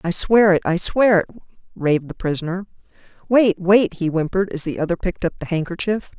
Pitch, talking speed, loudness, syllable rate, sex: 185 Hz, 195 wpm, -19 LUFS, 6.1 syllables/s, female